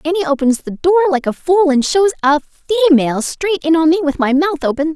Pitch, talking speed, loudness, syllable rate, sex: 320 Hz, 230 wpm, -14 LUFS, 6.6 syllables/s, female